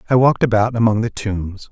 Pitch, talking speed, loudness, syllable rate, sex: 110 Hz, 210 wpm, -17 LUFS, 6.0 syllables/s, male